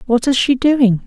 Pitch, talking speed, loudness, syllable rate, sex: 250 Hz, 225 wpm, -14 LUFS, 4.4 syllables/s, female